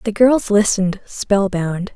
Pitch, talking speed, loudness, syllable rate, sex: 200 Hz, 125 wpm, -17 LUFS, 3.9 syllables/s, female